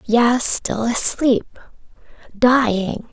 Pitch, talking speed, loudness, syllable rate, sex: 235 Hz, 60 wpm, -17 LUFS, 2.6 syllables/s, female